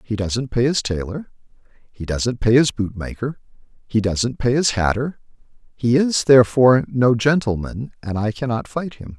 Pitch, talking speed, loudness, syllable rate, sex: 120 Hz, 165 wpm, -19 LUFS, 4.7 syllables/s, male